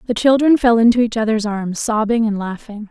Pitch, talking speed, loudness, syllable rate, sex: 225 Hz, 205 wpm, -16 LUFS, 5.5 syllables/s, female